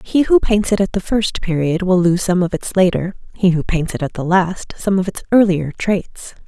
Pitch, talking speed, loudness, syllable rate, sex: 185 Hz, 240 wpm, -17 LUFS, 4.9 syllables/s, female